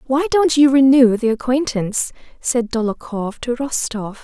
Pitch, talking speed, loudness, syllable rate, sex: 250 Hz, 140 wpm, -17 LUFS, 4.6 syllables/s, female